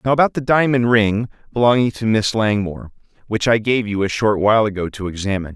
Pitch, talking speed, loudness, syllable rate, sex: 110 Hz, 205 wpm, -18 LUFS, 6.2 syllables/s, male